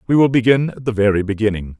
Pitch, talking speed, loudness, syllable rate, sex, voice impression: 115 Hz, 235 wpm, -17 LUFS, 6.8 syllables/s, male, masculine, very adult-like, thick, slightly fluent, cool, wild